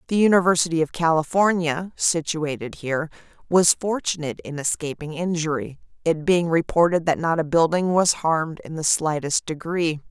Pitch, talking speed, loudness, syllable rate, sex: 165 Hz, 140 wpm, -22 LUFS, 5.1 syllables/s, female